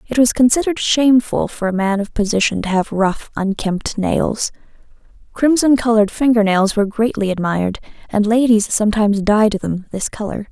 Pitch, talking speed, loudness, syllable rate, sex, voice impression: 215 Hz, 160 wpm, -16 LUFS, 5.4 syllables/s, female, feminine, adult-like, relaxed, slightly weak, soft, slightly raspy, intellectual, calm, friendly, reassuring, elegant, kind, modest